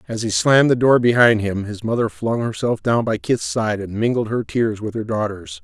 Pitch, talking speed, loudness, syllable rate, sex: 115 Hz, 235 wpm, -19 LUFS, 5.2 syllables/s, male